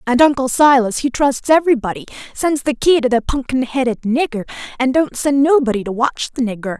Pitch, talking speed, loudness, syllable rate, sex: 260 Hz, 195 wpm, -16 LUFS, 5.6 syllables/s, female